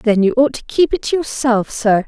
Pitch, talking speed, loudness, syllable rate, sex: 240 Hz, 260 wpm, -16 LUFS, 5.1 syllables/s, female